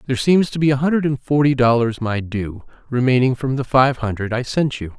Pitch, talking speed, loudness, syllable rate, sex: 130 Hz, 230 wpm, -18 LUFS, 5.7 syllables/s, male